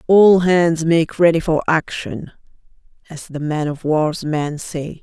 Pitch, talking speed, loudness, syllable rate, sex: 160 Hz, 155 wpm, -17 LUFS, 3.7 syllables/s, female